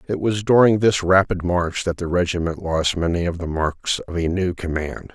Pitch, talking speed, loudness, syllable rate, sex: 90 Hz, 210 wpm, -20 LUFS, 4.8 syllables/s, male